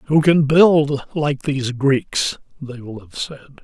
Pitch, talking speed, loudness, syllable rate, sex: 140 Hz, 165 wpm, -18 LUFS, 3.5 syllables/s, male